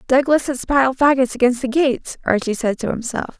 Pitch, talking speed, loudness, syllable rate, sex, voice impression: 255 Hz, 195 wpm, -18 LUFS, 5.7 syllables/s, female, very feminine, slightly young, slightly powerful, slightly unique, slightly kind